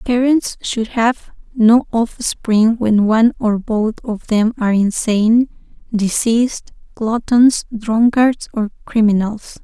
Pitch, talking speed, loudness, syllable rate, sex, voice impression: 225 Hz, 120 wpm, -16 LUFS, 3.7 syllables/s, female, feminine, adult-like, relaxed, weak, soft, raspy, calm, reassuring, elegant, kind, modest